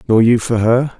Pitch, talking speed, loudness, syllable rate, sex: 115 Hz, 240 wpm, -14 LUFS, 4.9 syllables/s, male